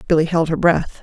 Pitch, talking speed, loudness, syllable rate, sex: 165 Hz, 235 wpm, -17 LUFS, 5.8 syllables/s, female